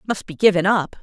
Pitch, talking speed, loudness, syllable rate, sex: 190 Hz, 235 wpm, -18 LUFS, 5.8 syllables/s, female